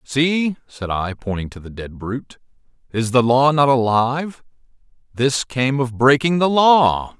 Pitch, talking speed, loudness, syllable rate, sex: 130 Hz, 160 wpm, -18 LUFS, 4.2 syllables/s, male